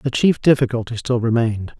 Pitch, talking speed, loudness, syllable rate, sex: 120 Hz, 165 wpm, -18 LUFS, 5.8 syllables/s, male